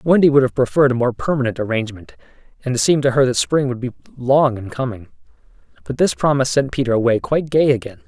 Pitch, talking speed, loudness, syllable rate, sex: 125 Hz, 215 wpm, -17 LUFS, 6.9 syllables/s, male